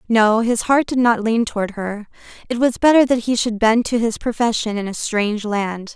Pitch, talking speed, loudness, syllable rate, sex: 225 Hz, 220 wpm, -18 LUFS, 5.0 syllables/s, female